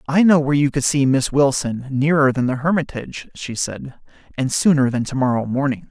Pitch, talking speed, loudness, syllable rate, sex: 135 Hz, 205 wpm, -18 LUFS, 5.5 syllables/s, male